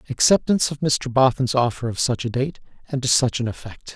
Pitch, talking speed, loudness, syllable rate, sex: 130 Hz, 210 wpm, -21 LUFS, 5.7 syllables/s, male